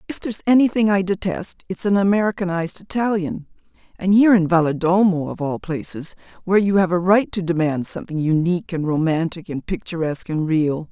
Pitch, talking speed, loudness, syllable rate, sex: 180 Hz, 165 wpm, -20 LUFS, 5.9 syllables/s, female